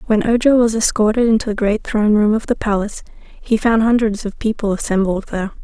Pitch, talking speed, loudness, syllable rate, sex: 215 Hz, 200 wpm, -16 LUFS, 6.1 syllables/s, female